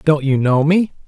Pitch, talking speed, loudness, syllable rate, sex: 150 Hz, 225 wpm, -15 LUFS, 4.7 syllables/s, male